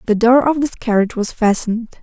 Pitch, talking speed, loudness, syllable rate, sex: 230 Hz, 210 wpm, -16 LUFS, 6.3 syllables/s, female